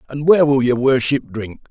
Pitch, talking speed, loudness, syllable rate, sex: 130 Hz, 210 wpm, -15 LUFS, 5.3 syllables/s, male